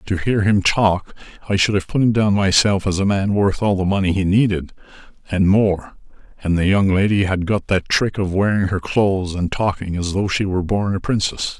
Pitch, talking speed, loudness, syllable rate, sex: 95 Hz, 225 wpm, -18 LUFS, 5.2 syllables/s, male